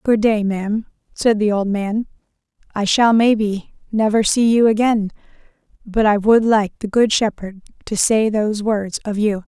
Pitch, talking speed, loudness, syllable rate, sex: 215 Hz, 170 wpm, -17 LUFS, 4.6 syllables/s, female